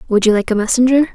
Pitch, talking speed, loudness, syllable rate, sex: 235 Hz, 260 wpm, -14 LUFS, 7.5 syllables/s, female